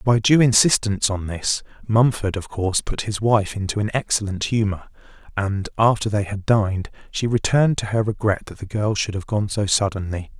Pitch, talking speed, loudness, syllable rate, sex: 105 Hz, 190 wpm, -21 LUFS, 5.3 syllables/s, male